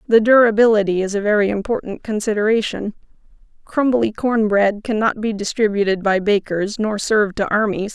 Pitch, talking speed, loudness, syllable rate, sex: 210 Hz, 145 wpm, -18 LUFS, 5.4 syllables/s, female